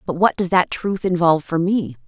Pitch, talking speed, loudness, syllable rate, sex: 175 Hz, 230 wpm, -19 LUFS, 5.4 syllables/s, female